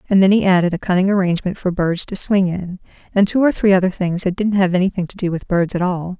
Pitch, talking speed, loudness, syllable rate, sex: 185 Hz, 270 wpm, -17 LUFS, 6.4 syllables/s, female